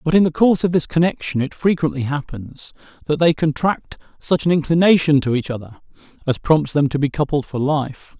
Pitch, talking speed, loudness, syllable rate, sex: 150 Hz, 200 wpm, -18 LUFS, 5.5 syllables/s, male